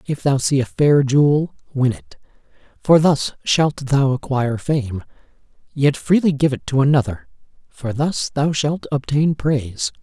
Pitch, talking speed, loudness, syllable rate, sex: 140 Hz, 155 wpm, -18 LUFS, 4.4 syllables/s, male